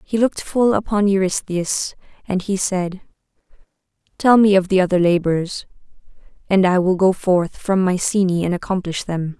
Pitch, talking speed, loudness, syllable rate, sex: 190 Hz, 155 wpm, -18 LUFS, 4.8 syllables/s, female